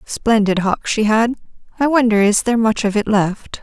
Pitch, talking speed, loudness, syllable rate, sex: 220 Hz, 180 wpm, -16 LUFS, 4.9 syllables/s, female